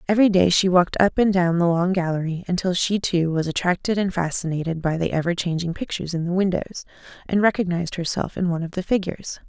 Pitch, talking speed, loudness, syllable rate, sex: 180 Hz, 210 wpm, -22 LUFS, 6.4 syllables/s, female